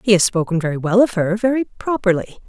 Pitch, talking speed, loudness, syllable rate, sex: 200 Hz, 195 wpm, -18 LUFS, 6.1 syllables/s, female